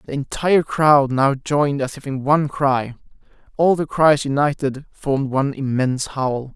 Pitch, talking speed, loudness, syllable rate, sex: 140 Hz, 165 wpm, -19 LUFS, 4.9 syllables/s, male